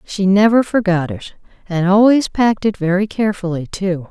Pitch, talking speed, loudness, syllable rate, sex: 195 Hz, 160 wpm, -16 LUFS, 5.1 syllables/s, female